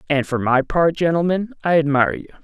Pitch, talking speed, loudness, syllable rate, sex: 155 Hz, 195 wpm, -18 LUFS, 6.0 syllables/s, male